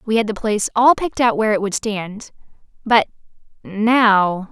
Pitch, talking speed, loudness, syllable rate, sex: 215 Hz, 160 wpm, -17 LUFS, 5.0 syllables/s, female